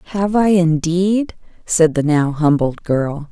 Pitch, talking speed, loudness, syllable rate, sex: 170 Hz, 145 wpm, -16 LUFS, 3.7 syllables/s, female